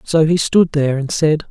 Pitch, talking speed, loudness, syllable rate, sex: 155 Hz, 240 wpm, -15 LUFS, 5.2 syllables/s, male